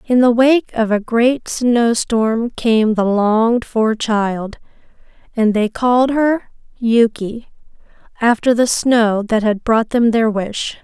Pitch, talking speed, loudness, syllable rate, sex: 230 Hz, 150 wpm, -15 LUFS, 3.5 syllables/s, female